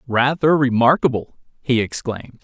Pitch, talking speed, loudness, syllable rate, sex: 130 Hz, 100 wpm, -18 LUFS, 5.2 syllables/s, male